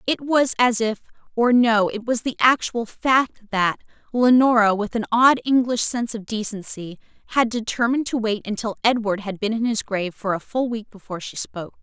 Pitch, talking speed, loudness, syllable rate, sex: 225 Hz, 185 wpm, -21 LUFS, 5.2 syllables/s, female